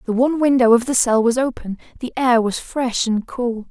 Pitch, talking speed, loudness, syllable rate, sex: 245 Hz, 225 wpm, -18 LUFS, 5.2 syllables/s, female